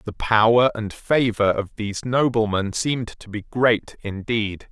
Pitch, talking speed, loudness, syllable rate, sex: 110 Hz, 155 wpm, -21 LUFS, 4.2 syllables/s, male